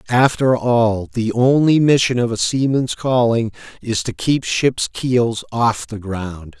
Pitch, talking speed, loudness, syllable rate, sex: 120 Hz, 155 wpm, -17 LUFS, 3.7 syllables/s, male